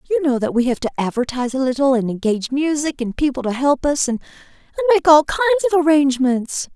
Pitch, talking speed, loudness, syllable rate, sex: 280 Hz, 205 wpm, -18 LUFS, 6.4 syllables/s, female